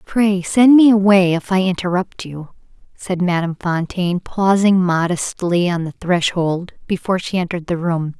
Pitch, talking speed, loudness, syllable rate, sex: 180 Hz, 155 wpm, -17 LUFS, 4.8 syllables/s, female